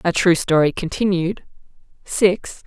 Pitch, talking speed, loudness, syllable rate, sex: 180 Hz, 115 wpm, -19 LUFS, 4.0 syllables/s, female